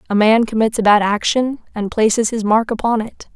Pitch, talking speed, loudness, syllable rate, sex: 220 Hz, 215 wpm, -16 LUFS, 5.3 syllables/s, female